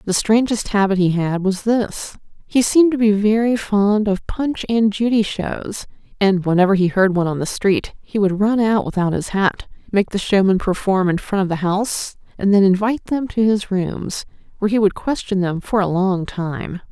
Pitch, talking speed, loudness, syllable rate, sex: 200 Hz, 205 wpm, -18 LUFS, 4.9 syllables/s, female